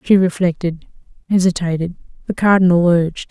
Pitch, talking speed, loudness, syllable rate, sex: 175 Hz, 90 wpm, -16 LUFS, 5.7 syllables/s, female